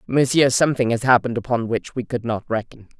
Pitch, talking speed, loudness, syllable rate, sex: 120 Hz, 200 wpm, -20 LUFS, 6.2 syllables/s, female